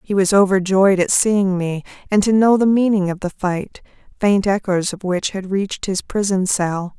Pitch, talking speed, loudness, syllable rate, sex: 195 Hz, 200 wpm, -17 LUFS, 4.7 syllables/s, female